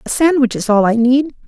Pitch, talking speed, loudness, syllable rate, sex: 250 Hz, 245 wpm, -14 LUFS, 5.6 syllables/s, female